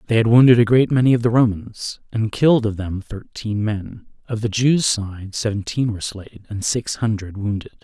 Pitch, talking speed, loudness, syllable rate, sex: 110 Hz, 200 wpm, -19 LUFS, 5.1 syllables/s, male